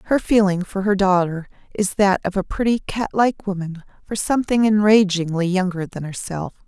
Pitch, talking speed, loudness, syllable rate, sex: 195 Hz, 170 wpm, -20 LUFS, 5.1 syllables/s, female